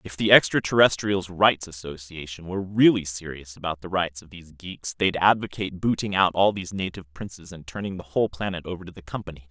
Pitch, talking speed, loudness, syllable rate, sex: 90 Hz, 195 wpm, -23 LUFS, 6.1 syllables/s, male